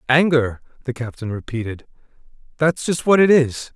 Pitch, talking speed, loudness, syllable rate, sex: 135 Hz, 145 wpm, -19 LUFS, 4.9 syllables/s, male